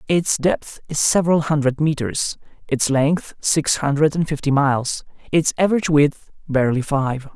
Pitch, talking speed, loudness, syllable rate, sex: 150 Hz, 145 wpm, -19 LUFS, 4.8 syllables/s, male